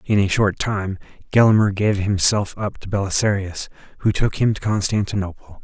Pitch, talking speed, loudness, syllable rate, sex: 100 Hz, 160 wpm, -20 LUFS, 5.2 syllables/s, male